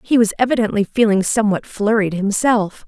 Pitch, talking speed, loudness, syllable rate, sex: 210 Hz, 145 wpm, -17 LUFS, 5.5 syllables/s, female